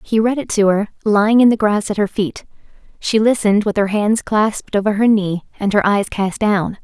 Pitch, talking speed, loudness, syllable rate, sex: 210 Hz, 230 wpm, -16 LUFS, 5.3 syllables/s, female